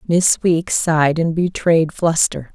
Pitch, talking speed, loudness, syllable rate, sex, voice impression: 165 Hz, 140 wpm, -16 LUFS, 3.8 syllables/s, female, very feminine, slightly middle-aged, slightly thin, slightly tensed, slightly powerful, slightly dark, slightly hard, clear, fluent, cool, intellectual, slightly refreshing, sincere, very calm, slightly friendly, reassuring, unique, slightly elegant, slightly wild, slightly sweet, lively, strict, slightly intense, slightly light